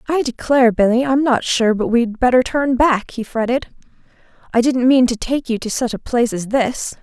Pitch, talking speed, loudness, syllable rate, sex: 245 Hz, 215 wpm, -17 LUFS, 5.3 syllables/s, female